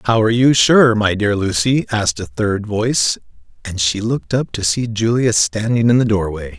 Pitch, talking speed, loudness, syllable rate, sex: 110 Hz, 200 wpm, -16 LUFS, 5.1 syllables/s, male